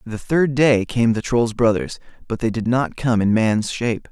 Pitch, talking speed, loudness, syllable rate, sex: 115 Hz, 220 wpm, -19 LUFS, 4.6 syllables/s, male